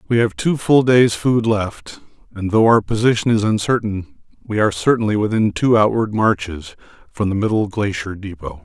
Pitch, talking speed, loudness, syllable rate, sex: 105 Hz, 175 wpm, -17 LUFS, 5.1 syllables/s, male